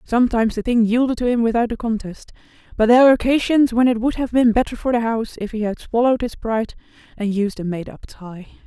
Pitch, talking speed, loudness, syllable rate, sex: 230 Hz, 235 wpm, -19 LUFS, 6.6 syllables/s, female